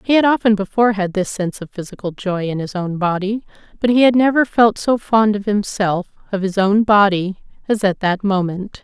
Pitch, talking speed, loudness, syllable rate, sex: 205 Hz, 210 wpm, -17 LUFS, 5.3 syllables/s, female